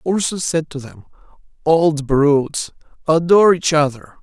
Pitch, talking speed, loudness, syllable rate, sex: 155 Hz, 115 wpm, -16 LUFS, 4.6 syllables/s, male